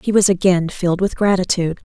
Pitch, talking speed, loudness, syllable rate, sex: 185 Hz, 190 wpm, -17 LUFS, 6.4 syllables/s, female